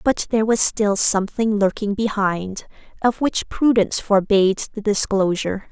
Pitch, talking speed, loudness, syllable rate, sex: 210 Hz, 135 wpm, -19 LUFS, 4.8 syllables/s, female